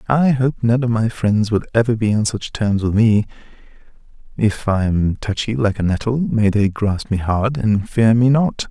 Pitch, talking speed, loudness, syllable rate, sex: 110 Hz, 205 wpm, -17 LUFS, 4.5 syllables/s, male